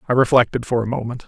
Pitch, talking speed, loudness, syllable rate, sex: 120 Hz, 235 wpm, -19 LUFS, 7.3 syllables/s, male